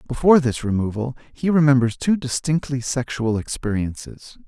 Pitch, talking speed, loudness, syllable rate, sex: 130 Hz, 120 wpm, -21 LUFS, 5.1 syllables/s, male